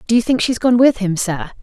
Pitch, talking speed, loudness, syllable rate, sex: 225 Hz, 295 wpm, -16 LUFS, 5.8 syllables/s, female